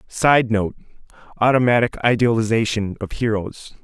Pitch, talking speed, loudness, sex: 115 Hz, 80 wpm, -19 LUFS, male